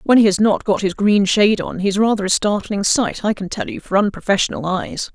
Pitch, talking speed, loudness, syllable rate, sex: 205 Hz, 245 wpm, -17 LUFS, 5.6 syllables/s, female